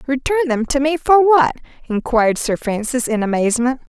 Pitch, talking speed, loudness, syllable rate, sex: 260 Hz, 150 wpm, -17 LUFS, 5.6 syllables/s, female